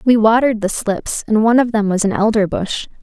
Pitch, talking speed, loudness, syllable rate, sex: 220 Hz, 220 wpm, -16 LUFS, 5.8 syllables/s, female